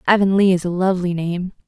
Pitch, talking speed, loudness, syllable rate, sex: 180 Hz, 180 wpm, -18 LUFS, 6.3 syllables/s, female